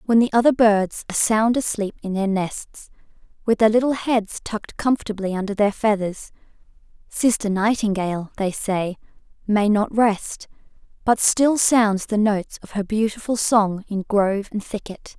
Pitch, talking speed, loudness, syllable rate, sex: 210 Hz, 155 wpm, -21 LUFS, 4.7 syllables/s, female